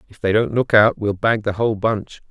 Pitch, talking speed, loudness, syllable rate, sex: 105 Hz, 260 wpm, -18 LUFS, 5.4 syllables/s, male